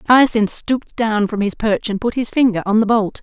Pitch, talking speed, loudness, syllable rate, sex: 220 Hz, 240 wpm, -17 LUFS, 5.3 syllables/s, female